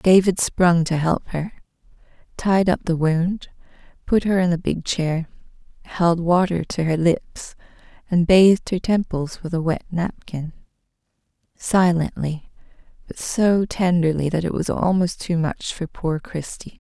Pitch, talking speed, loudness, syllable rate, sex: 170 Hz, 145 wpm, -21 LUFS, 4.1 syllables/s, female